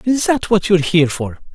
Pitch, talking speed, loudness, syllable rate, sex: 180 Hz, 235 wpm, -16 LUFS, 5.9 syllables/s, male